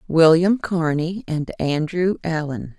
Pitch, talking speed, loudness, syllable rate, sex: 165 Hz, 110 wpm, -20 LUFS, 3.5 syllables/s, female